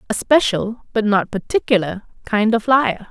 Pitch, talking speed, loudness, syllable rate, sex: 220 Hz, 155 wpm, -18 LUFS, 3.5 syllables/s, female